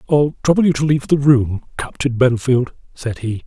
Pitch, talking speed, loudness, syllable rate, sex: 130 Hz, 190 wpm, -17 LUFS, 5.2 syllables/s, male